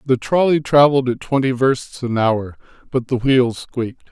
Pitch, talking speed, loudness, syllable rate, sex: 125 Hz, 175 wpm, -17 LUFS, 4.7 syllables/s, male